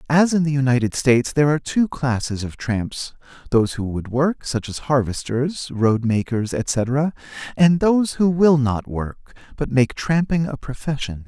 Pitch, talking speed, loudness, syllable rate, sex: 135 Hz, 170 wpm, -20 LUFS, 4.6 syllables/s, male